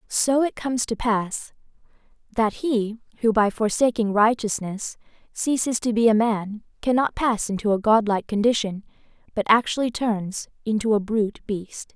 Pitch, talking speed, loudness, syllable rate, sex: 220 Hz, 145 wpm, -23 LUFS, 4.7 syllables/s, female